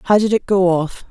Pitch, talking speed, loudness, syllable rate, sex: 190 Hz, 270 wpm, -16 LUFS, 5.6 syllables/s, female